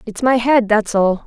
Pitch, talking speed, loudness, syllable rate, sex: 225 Hz, 235 wpm, -15 LUFS, 4.4 syllables/s, female